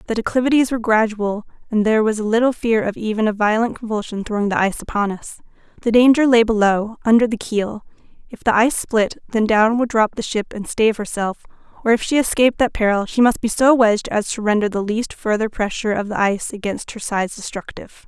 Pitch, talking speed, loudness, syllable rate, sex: 220 Hz, 210 wpm, -18 LUFS, 6.1 syllables/s, female